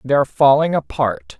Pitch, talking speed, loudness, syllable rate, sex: 130 Hz, 130 wpm, -16 LUFS, 4.7 syllables/s, male